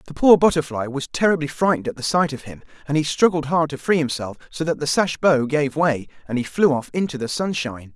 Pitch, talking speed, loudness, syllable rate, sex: 150 Hz, 240 wpm, -20 LUFS, 6.1 syllables/s, male